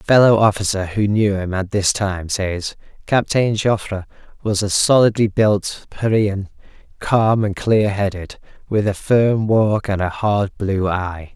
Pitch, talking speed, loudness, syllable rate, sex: 100 Hz, 160 wpm, -18 LUFS, 4.1 syllables/s, male